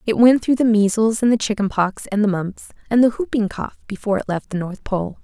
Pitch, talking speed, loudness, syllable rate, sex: 215 Hz, 250 wpm, -19 LUFS, 5.7 syllables/s, female